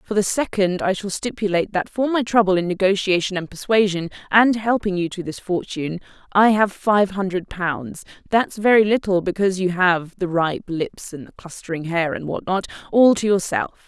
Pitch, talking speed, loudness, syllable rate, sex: 190 Hz, 190 wpm, -20 LUFS, 5.2 syllables/s, female